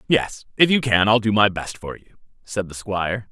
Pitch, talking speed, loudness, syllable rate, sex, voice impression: 105 Hz, 235 wpm, -20 LUFS, 4.6 syllables/s, male, very masculine, very adult-like, slightly middle-aged, very thick, slightly tensed, slightly powerful, bright, hard, clear, fluent, very cool, intellectual, very refreshing, very sincere, calm, slightly mature, friendly, reassuring, elegant, slightly wild, slightly sweet, lively, slightly strict, slightly intense